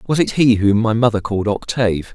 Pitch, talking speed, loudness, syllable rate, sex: 110 Hz, 225 wpm, -16 LUFS, 5.7 syllables/s, male